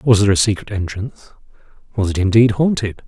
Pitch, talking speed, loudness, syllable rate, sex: 105 Hz, 175 wpm, -17 LUFS, 6.3 syllables/s, male